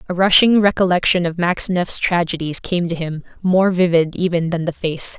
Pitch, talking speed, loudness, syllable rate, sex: 175 Hz, 175 wpm, -17 LUFS, 5.2 syllables/s, female